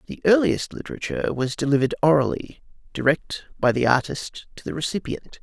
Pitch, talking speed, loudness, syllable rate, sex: 145 Hz, 145 wpm, -23 LUFS, 5.9 syllables/s, male